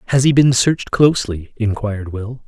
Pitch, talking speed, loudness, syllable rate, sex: 120 Hz, 170 wpm, -16 LUFS, 5.5 syllables/s, male